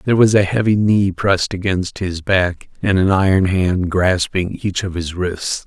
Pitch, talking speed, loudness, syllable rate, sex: 95 Hz, 190 wpm, -17 LUFS, 4.4 syllables/s, male